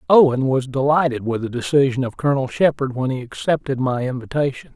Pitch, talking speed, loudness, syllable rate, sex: 130 Hz, 175 wpm, -20 LUFS, 5.9 syllables/s, male